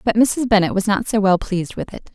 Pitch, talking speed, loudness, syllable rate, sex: 205 Hz, 280 wpm, -18 LUFS, 5.9 syllables/s, female